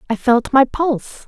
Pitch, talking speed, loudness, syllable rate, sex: 255 Hz, 190 wpm, -16 LUFS, 4.7 syllables/s, female